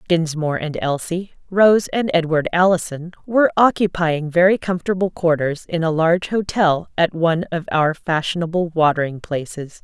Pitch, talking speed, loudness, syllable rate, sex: 170 Hz, 135 wpm, -19 LUFS, 5.1 syllables/s, female